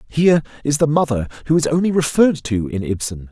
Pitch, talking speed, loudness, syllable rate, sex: 140 Hz, 200 wpm, -18 LUFS, 6.3 syllables/s, male